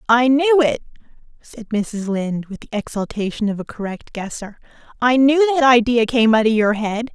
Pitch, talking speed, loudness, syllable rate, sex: 230 Hz, 185 wpm, -18 LUFS, 4.9 syllables/s, female